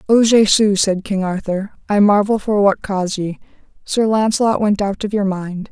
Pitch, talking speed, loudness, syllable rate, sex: 200 Hz, 190 wpm, -16 LUFS, 4.9 syllables/s, female